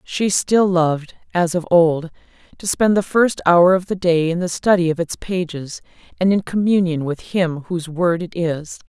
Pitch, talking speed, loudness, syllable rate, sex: 175 Hz, 195 wpm, -18 LUFS, 4.6 syllables/s, female